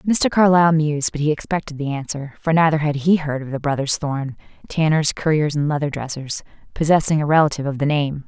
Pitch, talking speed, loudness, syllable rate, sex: 150 Hz, 205 wpm, -19 LUFS, 6.0 syllables/s, female